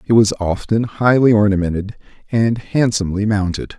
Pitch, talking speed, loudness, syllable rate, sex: 105 Hz, 125 wpm, -17 LUFS, 5.2 syllables/s, male